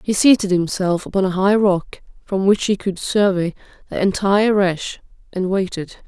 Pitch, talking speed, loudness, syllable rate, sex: 190 Hz, 170 wpm, -18 LUFS, 5.1 syllables/s, female